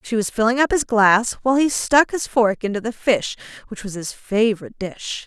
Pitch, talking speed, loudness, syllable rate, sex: 225 Hz, 215 wpm, -19 LUFS, 5.2 syllables/s, female